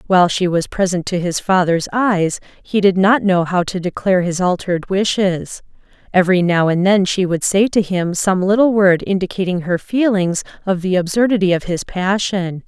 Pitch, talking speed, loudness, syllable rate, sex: 185 Hz, 185 wpm, -16 LUFS, 5.0 syllables/s, female